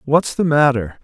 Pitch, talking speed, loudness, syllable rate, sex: 140 Hz, 175 wpm, -16 LUFS, 4.5 syllables/s, male